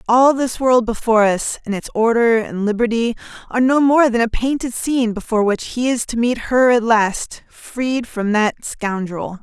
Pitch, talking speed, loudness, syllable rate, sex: 230 Hz, 190 wpm, -17 LUFS, 4.7 syllables/s, female